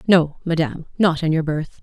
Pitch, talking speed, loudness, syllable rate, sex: 160 Hz, 195 wpm, -20 LUFS, 5.4 syllables/s, female